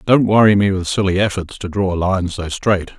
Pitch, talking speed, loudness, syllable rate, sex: 95 Hz, 240 wpm, -16 LUFS, 5.3 syllables/s, male